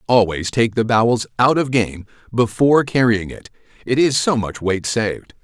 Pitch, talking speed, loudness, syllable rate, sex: 115 Hz, 175 wpm, -18 LUFS, 4.9 syllables/s, male